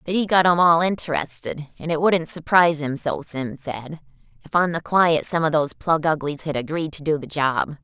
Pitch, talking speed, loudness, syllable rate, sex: 155 Hz, 220 wpm, -21 LUFS, 5.0 syllables/s, female